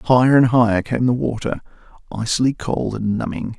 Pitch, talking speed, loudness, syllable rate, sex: 120 Hz, 165 wpm, -18 LUFS, 5.2 syllables/s, male